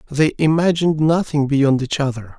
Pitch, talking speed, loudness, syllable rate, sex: 145 Hz, 150 wpm, -17 LUFS, 5.2 syllables/s, male